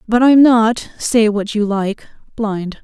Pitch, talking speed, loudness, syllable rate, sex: 220 Hz, 170 wpm, -15 LUFS, 3.6 syllables/s, female